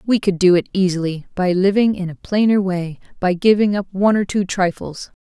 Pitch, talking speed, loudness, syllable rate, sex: 190 Hz, 205 wpm, -18 LUFS, 5.4 syllables/s, female